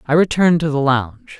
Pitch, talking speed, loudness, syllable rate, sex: 150 Hz, 215 wpm, -16 LUFS, 6.2 syllables/s, male